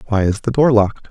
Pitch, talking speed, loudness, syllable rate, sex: 110 Hz, 270 wpm, -15 LUFS, 6.7 syllables/s, male